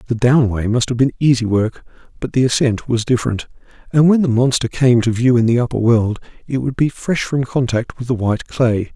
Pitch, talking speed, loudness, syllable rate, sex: 120 Hz, 220 wpm, -16 LUFS, 5.5 syllables/s, male